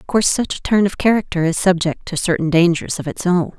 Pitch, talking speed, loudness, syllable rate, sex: 180 Hz, 250 wpm, -17 LUFS, 6.0 syllables/s, female